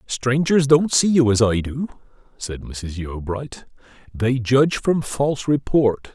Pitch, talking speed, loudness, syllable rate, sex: 125 Hz, 145 wpm, -20 LUFS, 4.0 syllables/s, male